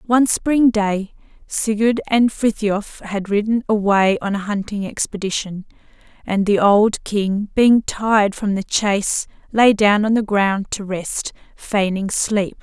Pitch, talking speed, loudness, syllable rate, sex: 210 Hz, 145 wpm, -18 LUFS, 3.9 syllables/s, female